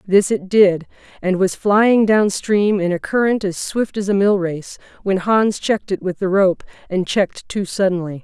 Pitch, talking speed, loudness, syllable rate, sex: 195 Hz, 205 wpm, -18 LUFS, 4.5 syllables/s, female